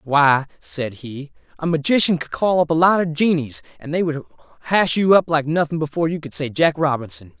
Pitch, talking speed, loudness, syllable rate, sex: 155 Hz, 210 wpm, -19 LUFS, 5.4 syllables/s, male